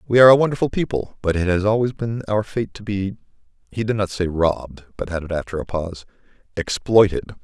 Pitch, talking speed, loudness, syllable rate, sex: 100 Hz, 185 wpm, -20 LUFS, 6.2 syllables/s, male